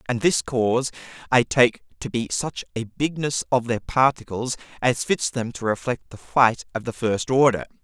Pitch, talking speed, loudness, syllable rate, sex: 125 Hz, 185 wpm, -23 LUFS, 4.9 syllables/s, male